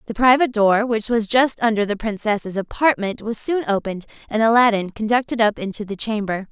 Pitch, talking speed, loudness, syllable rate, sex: 220 Hz, 185 wpm, -19 LUFS, 5.6 syllables/s, female